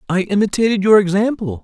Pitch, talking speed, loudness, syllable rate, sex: 200 Hz, 145 wpm, -15 LUFS, 6.2 syllables/s, male